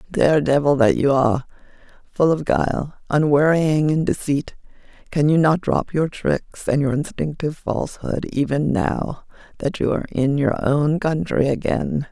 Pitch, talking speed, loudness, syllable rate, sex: 145 Hz, 155 wpm, -20 LUFS, 4.6 syllables/s, female